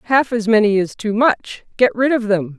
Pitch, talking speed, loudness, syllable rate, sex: 220 Hz, 230 wpm, -17 LUFS, 4.9 syllables/s, female